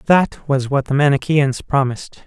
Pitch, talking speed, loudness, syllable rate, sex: 140 Hz, 160 wpm, -17 LUFS, 4.6 syllables/s, male